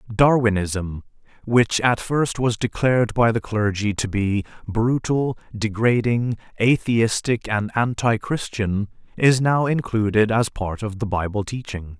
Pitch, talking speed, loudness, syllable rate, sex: 110 Hz, 130 wpm, -21 LUFS, 4.0 syllables/s, male